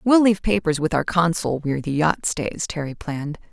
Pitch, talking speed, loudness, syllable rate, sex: 165 Hz, 205 wpm, -22 LUFS, 5.5 syllables/s, female